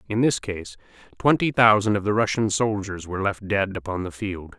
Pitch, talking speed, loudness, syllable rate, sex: 100 Hz, 195 wpm, -23 LUFS, 5.3 syllables/s, male